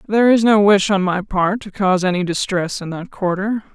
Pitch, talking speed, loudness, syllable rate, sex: 195 Hz, 225 wpm, -17 LUFS, 5.4 syllables/s, female